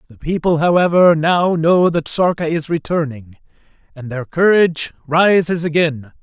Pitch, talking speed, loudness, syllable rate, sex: 160 Hz, 135 wpm, -15 LUFS, 4.6 syllables/s, male